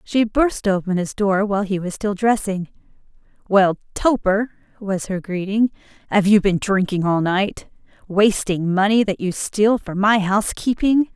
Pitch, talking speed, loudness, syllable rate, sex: 200 Hz, 155 wpm, -19 LUFS, 4.4 syllables/s, female